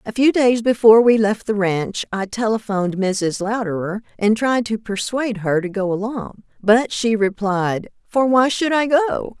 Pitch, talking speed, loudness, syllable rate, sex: 220 Hz, 180 wpm, -18 LUFS, 4.5 syllables/s, female